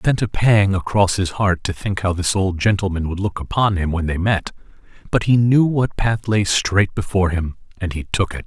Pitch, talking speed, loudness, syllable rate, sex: 95 Hz, 235 wpm, -19 LUFS, 5.2 syllables/s, male